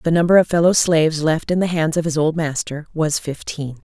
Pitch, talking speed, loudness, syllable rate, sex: 160 Hz, 230 wpm, -18 LUFS, 5.5 syllables/s, female